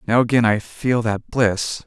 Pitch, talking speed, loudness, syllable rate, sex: 115 Hz, 195 wpm, -19 LUFS, 4.1 syllables/s, male